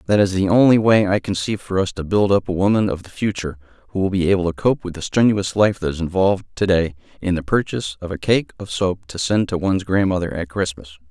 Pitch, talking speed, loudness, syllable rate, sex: 95 Hz, 260 wpm, -19 LUFS, 6.2 syllables/s, male